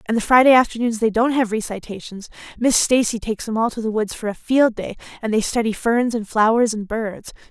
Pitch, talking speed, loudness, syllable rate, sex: 225 Hz, 225 wpm, -19 LUFS, 5.7 syllables/s, female